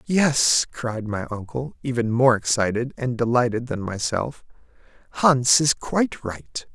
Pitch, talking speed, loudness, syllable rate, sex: 120 Hz, 135 wpm, -22 LUFS, 4.1 syllables/s, male